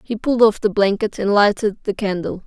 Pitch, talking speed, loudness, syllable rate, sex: 205 Hz, 220 wpm, -18 LUFS, 5.5 syllables/s, female